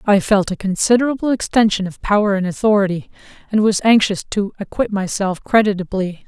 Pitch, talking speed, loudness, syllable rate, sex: 205 Hz, 155 wpm, -17 LUFS, 5.6 syllables/s, female